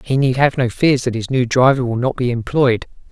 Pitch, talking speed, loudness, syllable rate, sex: 125 Hz, 250 wpm, -16 LUFS, 5.3 syllables/s, male